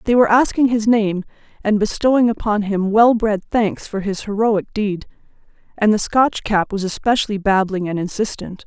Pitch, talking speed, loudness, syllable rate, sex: 210 Hz, 165 wpm, -18 LUFS, 5.0 syllables/s, female